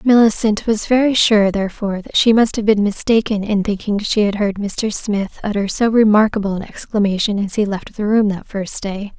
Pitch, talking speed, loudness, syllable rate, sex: 210 Hz, 200 wpm, -17 LUFS, 5.2 syllables/s, female